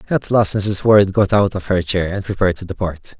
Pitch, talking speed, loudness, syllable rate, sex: 100 Hz, 245 wpm, -16 LUFS, 5.7 syllables/s, male